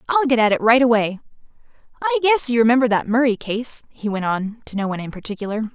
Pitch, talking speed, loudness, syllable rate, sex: 235 Hz, 220 wpm, -19 LUFS, 6.3 syllables/s, female